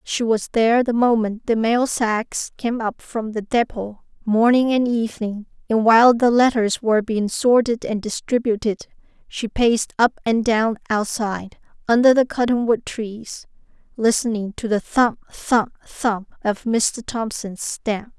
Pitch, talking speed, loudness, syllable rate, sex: 225 Hz, 150 wpm, -20 LUFS, 4.3 syllables/s, female